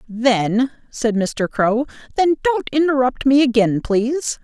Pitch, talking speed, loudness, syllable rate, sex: 250 Hz, 120 wpm, -18 LUFS, 4.0 syllables/s, female